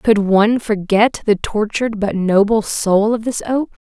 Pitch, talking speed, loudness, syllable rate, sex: 215 Hz, 170 wpm, -16 LUFS, 4.4 syllables/s, female